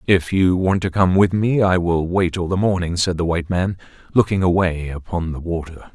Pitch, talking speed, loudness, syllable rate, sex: 90 Hz, 220 wpm, -19 LUFS, 5.1 syllables/s, male